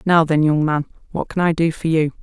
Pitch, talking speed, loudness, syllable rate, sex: 160 Hz, 270 wpm, -19 LUFS, 5.5 syllables/s, female